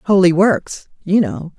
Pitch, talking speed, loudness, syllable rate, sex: 185 Hz, 150 wpm, -15 LUFS, 3.9 syllables/s, female